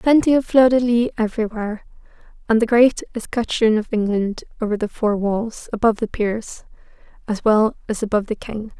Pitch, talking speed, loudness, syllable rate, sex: 220 Hz, 170 wpm, -19 LUFS, 5.4 syllables/s, female